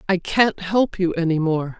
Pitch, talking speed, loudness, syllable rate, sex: 180 Hz, 200 wpm, -20 LUFS, 4.4 syllables/s, female